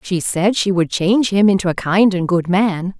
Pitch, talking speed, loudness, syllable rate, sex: 190 Hz, 240 wpm, -16 LUFS, 4.8 syllables/s, female